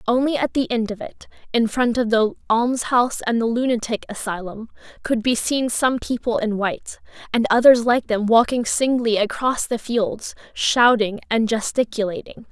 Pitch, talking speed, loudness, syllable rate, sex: 230 Hz, 165 wpm, -20 LUFS, 4.8 syllables/s, female